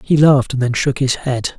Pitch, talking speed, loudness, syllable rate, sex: 135 Hz, 265 wpm, -16 LUFS, 5.5 syllables/s, male